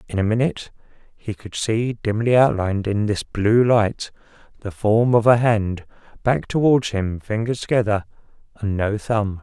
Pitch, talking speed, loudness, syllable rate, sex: 110 Hz, 160 wpm, -20 LUFS, 4.6 syllables/s, male